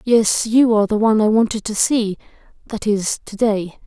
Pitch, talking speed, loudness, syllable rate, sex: 215 Hz, 200 wpm, -17 LUFS, 5.0 syllables/s, female